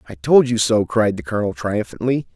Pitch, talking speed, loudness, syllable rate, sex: 110 Hz, 205 wpm, -18 LUFS, 5.7 syllables/s, male